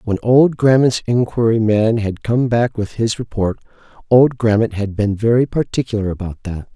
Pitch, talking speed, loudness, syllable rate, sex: 110 Hz, 170 wpm, -16 LUFS, 4.8 syllables/s, male